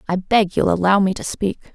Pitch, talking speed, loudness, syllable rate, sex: 195 Hz, 240 wpm, -18 LUFS, 5.1 syllables/s, female